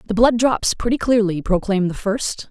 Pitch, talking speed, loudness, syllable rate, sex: 215 Hz, 190 wpm, -19 LUFS, 5.2 syllables/s, female